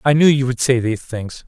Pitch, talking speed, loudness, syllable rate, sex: 130 Hz, 285 wpm, -17 LUFS, 5.8 syllables/s, male